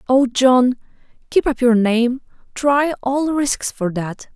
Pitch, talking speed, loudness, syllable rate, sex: 255 Hz, 140 wpm, -17 LUFS, 3.3 syllables/s, female